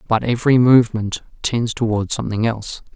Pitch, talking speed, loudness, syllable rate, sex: 115 Hz, 140 wpm, -18 LUFS, 6.0 syllables/s, male